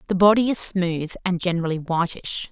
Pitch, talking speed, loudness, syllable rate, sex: 180 Hz, 165 wpm, -21 LUFS, 5.4 syllables/s, female